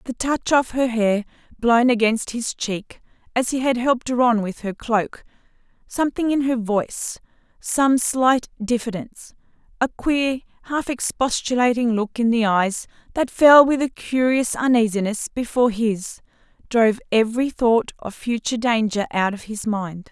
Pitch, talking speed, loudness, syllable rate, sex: 235 Hz, 150 wpm, -20 LUFS, 4.6 syllables/s, female